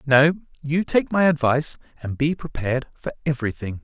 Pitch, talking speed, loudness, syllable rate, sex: 140 Hz, 155 wpm, -22 LUFS, 5.8 syllables/s, male